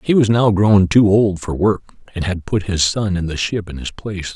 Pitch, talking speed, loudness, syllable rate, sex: 95 Hz, 260 wpm, -17 LUFS, 4.9 syllables/s, male